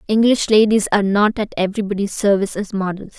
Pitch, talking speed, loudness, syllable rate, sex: 205 Hz, 170 wpm, -17 LUFS, 6.5 syllables/s, female